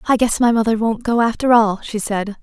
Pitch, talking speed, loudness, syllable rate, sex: 225 Hz, 245 wpm, -17 LUFS, 5.6 syllables/s, female